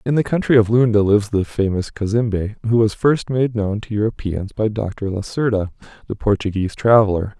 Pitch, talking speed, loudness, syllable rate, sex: 110 Hz, 180 wpm, -18 LUFS, 5.6 syllables/s, male